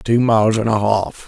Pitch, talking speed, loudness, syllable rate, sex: 110 Hz, 235 wpm, -16 LUFS, 4.9 syllables/s, male